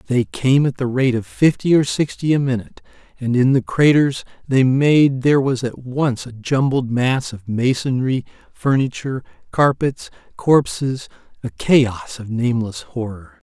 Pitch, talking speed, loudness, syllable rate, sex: 130 Hz, 150 wpm, -18 LUFS, 4.4 syllables/s, male